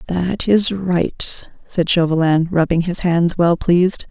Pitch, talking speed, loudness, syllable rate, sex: 175 Hz, 145 wpm, -17 LUFS, 3.7 syllables/s, female